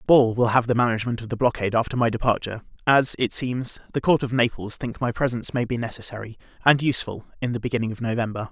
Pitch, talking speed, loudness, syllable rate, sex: 120 Hz, 220 wpm, -23 LUFS, 6.9 syllables/s, male